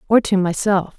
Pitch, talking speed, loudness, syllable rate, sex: 195 Hz, 180 wpm, -18 LUFS, 4.9 syllables/s, female